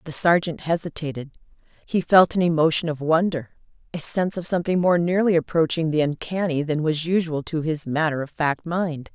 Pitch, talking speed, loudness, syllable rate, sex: 160 Hz, 170 wpm, -22 LUFS, 5.4 syllables/s, female